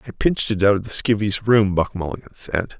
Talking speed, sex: 235 wpm, male